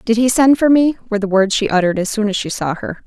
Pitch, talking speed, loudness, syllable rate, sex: 220 Hz, 315 wpm, -15 LUFS, 6.7 syllables/s, female